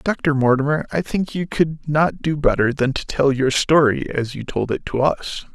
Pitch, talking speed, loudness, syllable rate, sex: 145 Hz, 215 wpm, -19 LUFS, 4.5 syllables/s, male